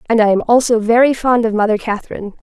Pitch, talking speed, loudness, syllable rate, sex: 225 Hz, 195 wpm, -14 LUFS, 6.4 syllables/s, female